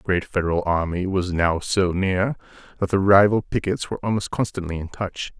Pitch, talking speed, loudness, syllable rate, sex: 95 Hz, 190 wpm, -22 LUFS, 5.3 syllables/s, male